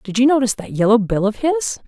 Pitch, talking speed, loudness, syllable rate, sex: 225 Hz, 255 wpm, -17 LUFS, 6.2 syllables/s, female